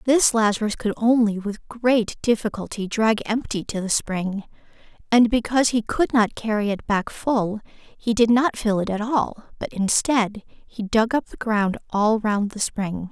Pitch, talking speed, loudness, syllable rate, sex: 220 Hz, 180 wpm, -22 LUFS, 4.2 syllables/s, female